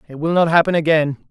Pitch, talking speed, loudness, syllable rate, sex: 160 Hz, 230 wpm, -16 LUFS, 6.4 syllables/s, male